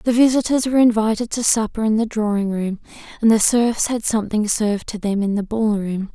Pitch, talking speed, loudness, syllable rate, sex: 220 Hz, 205 wpm, -19 LUFS, 5.6 syllables/s, female